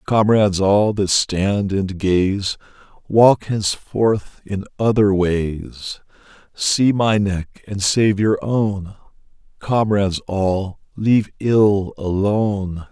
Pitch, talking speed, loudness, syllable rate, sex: 100 Hz, 105 wpm, -18 LUFS, 3.1 syllables/s, male